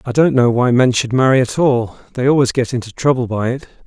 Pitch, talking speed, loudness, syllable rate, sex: 125 Hz, 250 wpm, -15 LUFS, 5.9 syllables/s, male